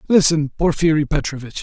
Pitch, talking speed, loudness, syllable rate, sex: 155 Hz, 110 wpm, -18 LUFS, 5.3 syllables/s, male